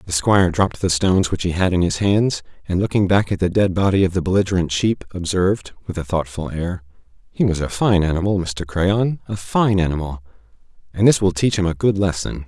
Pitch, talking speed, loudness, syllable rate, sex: 90 Hz, 210 wpm, -19 LUFS, 5.8 syllables/s, male